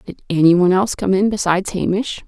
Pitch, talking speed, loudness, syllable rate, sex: 190 Hz, 210 wpm, -17 LUFS, 6.7 syllables/s, female